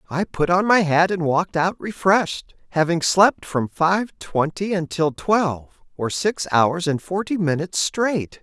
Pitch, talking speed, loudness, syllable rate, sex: 170 Hz, 165 wpm, -20 LUFS, 4.3 syllables/s, male